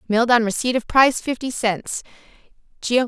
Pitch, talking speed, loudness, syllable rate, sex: 235 Hz, 155 wpm, -19 LUFS, 5.6 syllables/s, female